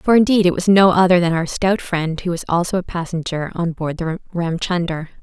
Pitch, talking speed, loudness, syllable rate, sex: 175 Hz, 220 wpm, -18 LUFS, 5.2 syllables/s, female